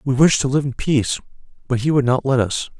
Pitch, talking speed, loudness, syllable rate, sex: 130 Hz, 255 wpm, -19 LUFS, 6.0 syllables/s, male